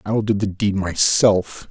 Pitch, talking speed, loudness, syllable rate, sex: 100 Hz, 175 wpm, -18 LUFS, 3.7 syllables/s, male